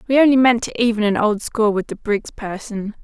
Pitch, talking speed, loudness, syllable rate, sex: 220 Hz, 235 wpm, -18 LUFS, 5.6 syllables/s, female